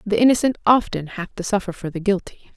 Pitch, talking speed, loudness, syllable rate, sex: 200 Hz, 210 wpm, -20 LUFS, 6.3 syllables/s, female